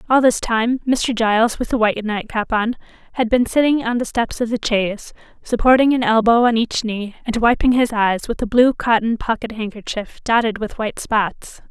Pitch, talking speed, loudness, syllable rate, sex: 230 Hz, 200 wpm, -18 LUFS, 5.2 syllables/s, female